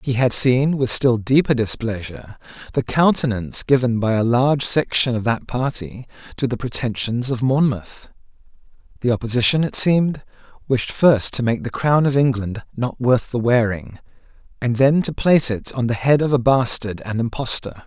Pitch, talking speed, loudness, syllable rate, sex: 125 Hz, 170 wpm, -19 LUFS, 5.0 syllables/s, male